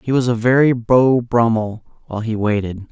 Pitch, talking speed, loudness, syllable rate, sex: 115 Hz, 185 wpm, -16 LUFS, 5.1 syllables/s, male